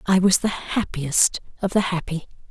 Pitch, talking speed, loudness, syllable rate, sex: 180 Hz, 165 wpm, -22 LUFS, 4.6 syllables/s, female